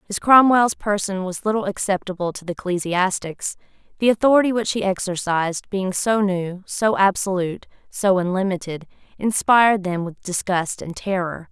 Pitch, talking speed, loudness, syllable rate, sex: 190 Hz, 140 wpm, -20 LUFS, 5.0 syllables/s, female